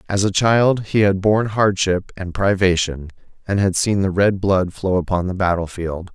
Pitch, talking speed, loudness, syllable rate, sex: 95 Hz, 185 wpm, -18 LUFS, 4.7 syllables/s, male